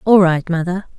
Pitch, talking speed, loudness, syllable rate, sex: 180 Hz, 185 wpm, -16 LUFS, 5.0 syllables/s, female